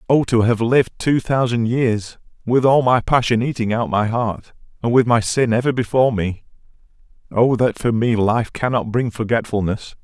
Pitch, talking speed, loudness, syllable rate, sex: 115 Hz, 180 wpm, -18 LUFS, 4.9 syllables/s, male